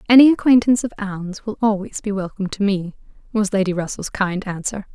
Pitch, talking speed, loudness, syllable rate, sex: 200 Hz, 180 wpm, -19 LUFS, 6.1 syllables/s, female